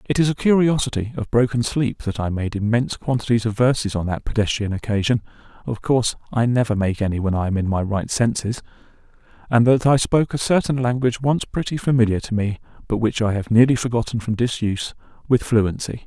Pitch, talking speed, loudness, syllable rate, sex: 115 Hz, 200 wpm, -20 LUFS, 5.0 syllables/s, male